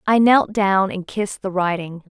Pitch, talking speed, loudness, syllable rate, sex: 195 Hz, 195 wpm, -19 LUFS, 4.7 syllables/s, female